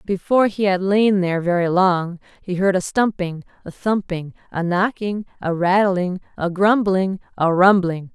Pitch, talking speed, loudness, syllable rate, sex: 190 Hz, 155 wpm, -19 LUFS, 4.4 syllables/s, female